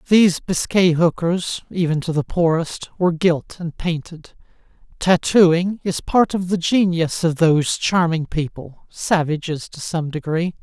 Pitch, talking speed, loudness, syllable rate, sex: 170 Hz, 140 wpm, -19 LUFS, 4.2 syllables/s, male